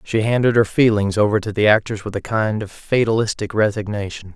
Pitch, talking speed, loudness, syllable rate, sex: 105 Hz, 195 wpm, -18 LUFS, 5.7 syllables/s, male